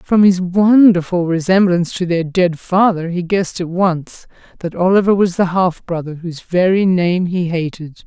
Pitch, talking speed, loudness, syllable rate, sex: 180 Hz, 170 wpm, -15 LUFS, 4.7 syllables/s, female